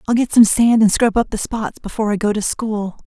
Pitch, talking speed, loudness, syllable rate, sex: 215 Hz, 275 wpm, -16 LUFS, 5.7 syllables/s, female